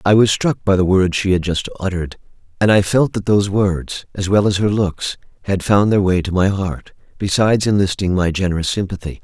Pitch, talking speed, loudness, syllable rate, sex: 95 Hz, 215 wpm, -17 LUFS, 5.5 syllables/s, male